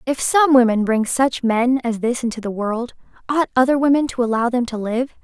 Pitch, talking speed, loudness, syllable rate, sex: 245 Hz, 220 wpm, -18 LUFS, 5.2 syllables/s, female